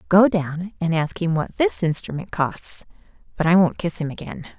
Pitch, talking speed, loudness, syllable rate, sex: 175 Hz, 195 wpm, -21 LUFS, 4.9 syllables/s, female